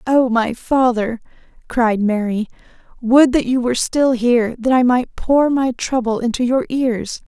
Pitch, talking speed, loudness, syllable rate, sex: 245 Hz, 165 wpm, -17 LUFS, 4.3 syllables/s, female